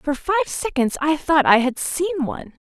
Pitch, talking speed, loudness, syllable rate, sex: 305 Hz, 205 wpm, -20 LUFS, 4.8 syllables/s, female